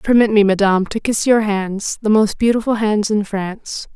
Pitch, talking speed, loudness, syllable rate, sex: 210 Hz, 195 wpm, -16 LUFS, 5.0 syllables/s, female